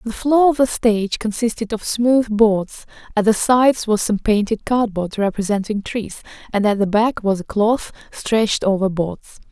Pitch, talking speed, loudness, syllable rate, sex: 215 Hz, 175 wpm, -18 LUFS, 4.7 syllables/s, female